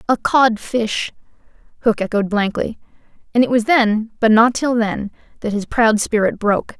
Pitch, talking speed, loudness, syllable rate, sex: 225 Hz, 160 wpm, -17 LUFS, 4.6 syllables/s, female